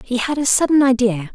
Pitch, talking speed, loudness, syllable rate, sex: 250 Hz, 225 wpm, -16 LUFS, 5.6 syllables/s, female